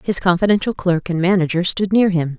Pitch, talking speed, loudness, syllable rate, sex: 180 Hz, 200 wpm, -17 LUFS, 5.7 syllables/s, female